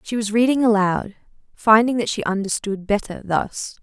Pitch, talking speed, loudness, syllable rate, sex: 215 Hz, 155 wpm, -20 LUFS, 4.9 syllables/s, female